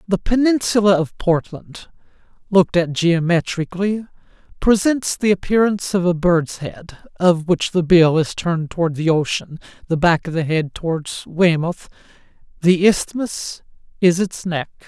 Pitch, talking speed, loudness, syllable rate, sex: 175 Hz, 140 wpm, -18 LUFS, 4.5 syllables/s, male